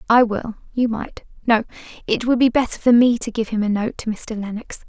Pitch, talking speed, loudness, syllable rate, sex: 230 Hz, 210 wpm, -20 LUFS, 5.5 syllables/s, female